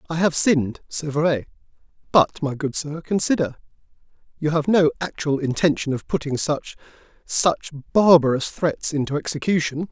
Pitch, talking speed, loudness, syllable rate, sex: 155 Hz, 115 wpm, -21 LUFS, 4.9 syllables/s, male